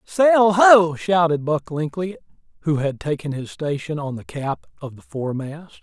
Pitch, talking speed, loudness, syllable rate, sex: 155 Hz, 165 wpm, -20 LUFS, 4.4 syllables/s, male